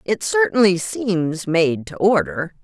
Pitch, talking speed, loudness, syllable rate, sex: 185 Hz, 135 wpm, -19 LUFS, 3.6 syllables/s, female